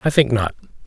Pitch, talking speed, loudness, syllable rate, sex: 125 Hz, 205 wpm, -19 LUFS, 6.3 syllables/s, male